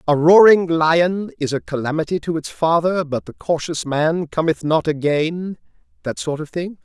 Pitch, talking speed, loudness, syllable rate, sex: 155 Hz, 175 wpm, -18 LUFS, 4.6 syllables/s, male